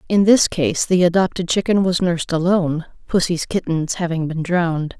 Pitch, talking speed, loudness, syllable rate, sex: 175 Hz, 170 wpm, -18 LUFS, 5.2 syllables/s, female